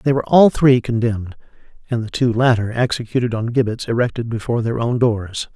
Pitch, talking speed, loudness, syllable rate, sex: 120 Hz, 185 wpm, -18 LUFS, 5.8 syllables/s, male